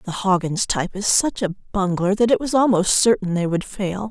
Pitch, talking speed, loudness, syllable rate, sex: 200 Hz, 220 wpm, -20 LUFS, 5.3 syllables/s, female